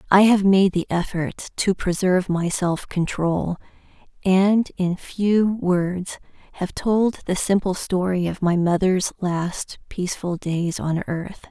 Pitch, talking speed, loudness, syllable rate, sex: 185 Hz, 140 wpm, -21 LUFS, 3.7 syllables/s, female